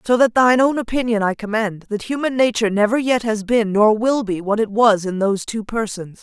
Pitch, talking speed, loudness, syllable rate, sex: 220 Hz, 230 wpm, -18 LUFS, 5.6 syllables/s, female